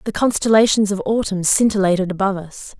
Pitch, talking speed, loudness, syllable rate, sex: 200 Hz, 150 wpm, -17 LUFS, 6.1 syllables/s, female